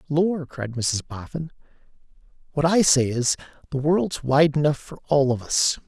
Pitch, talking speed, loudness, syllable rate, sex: 145 Hz, 165 wpm, -22 LUFS, 4.3 syllables/s, male